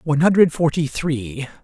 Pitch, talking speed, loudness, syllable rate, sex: 150 Hz, 145 wpm, -18 LUFS, 5.0 syllables/s, male